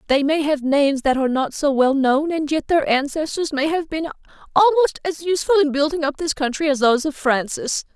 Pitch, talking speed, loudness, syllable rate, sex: 295 Hz, 220 wpm, -19 LUFS, 5.7 syllables/s, female